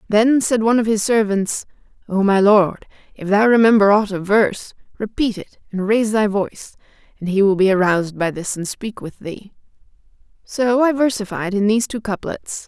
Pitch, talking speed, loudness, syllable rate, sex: 210 Hz, 185 wpm, -17 LUFS, 5.3 syllables/s, female